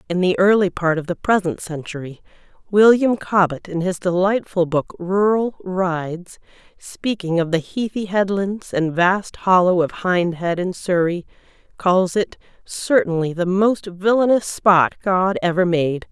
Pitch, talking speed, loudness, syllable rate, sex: 185 Hz, 140 wpm, -19 LUFS, 4.2 syllables/s, female